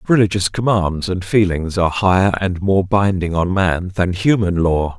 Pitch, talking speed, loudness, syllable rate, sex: 95 Hz, 170 wpm, -17 LUFS, 4.7 syllables/s, male